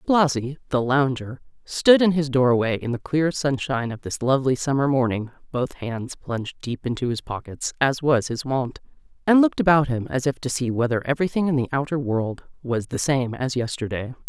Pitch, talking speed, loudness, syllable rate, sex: 130 Hz, 195 wpm, -23 LUFS, 5.3 syllables/s, female